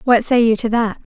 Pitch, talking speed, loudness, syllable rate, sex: 230 Hz, 260 wpm, -16 LUFS, 5.5 syllables/s, female